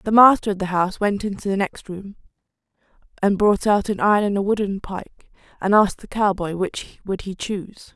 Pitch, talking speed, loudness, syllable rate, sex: 200 Hz, 205 wpm, -20 LUFS, 5.6 syllables/s, female